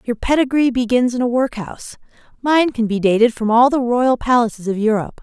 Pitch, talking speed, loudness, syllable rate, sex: 240 Hz, 195 wpm, -16 LUFS, 5.8 syllables/s, female